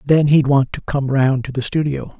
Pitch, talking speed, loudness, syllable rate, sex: 140 Hz, 245 wpm, -17 LUFS, 4.8 syllables/s, male